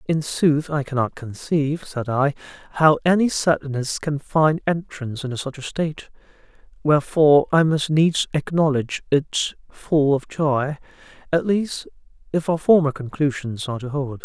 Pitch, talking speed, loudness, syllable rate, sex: 145 Hz, 145 wpm, -21 LUFS, 4.7 syllables/s, male